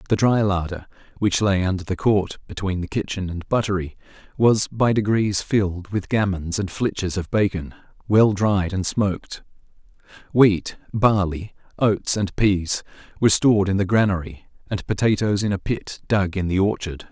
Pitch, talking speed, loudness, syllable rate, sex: 100 Hz, 160 wpm, -21 LUFS, 4.8 syllables/s, male